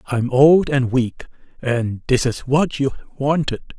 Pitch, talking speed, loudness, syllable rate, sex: 135 Hz, 160 wpm, -19 LUFS, 3.8 syllables/s, male